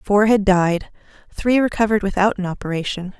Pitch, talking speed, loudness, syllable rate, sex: 200 Hz, 150 wpm, -19 LUFS, 5.7 syllables/s, female